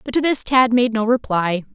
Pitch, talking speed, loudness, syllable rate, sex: 235 Hz, 240 wpm, -18 LUFS, 5.1 syllables/s, female